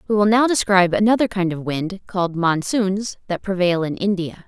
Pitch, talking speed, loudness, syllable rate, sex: 190 Hz, 190 wpm, -19 LUFS, 5.3 syllables/s, female